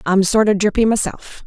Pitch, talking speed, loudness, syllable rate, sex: 205 Hz, 205 wpm, -16 LUFS, 5.2 syllables/s, female